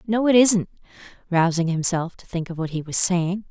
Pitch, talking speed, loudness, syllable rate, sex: 180 Hz, 205 wpm, -21 LUFS, 5.1 syllables/s, female